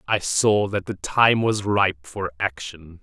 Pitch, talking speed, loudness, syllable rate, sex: 95 Hz, 180 wpm, -21 LUFS, 3.6 syllables/s, male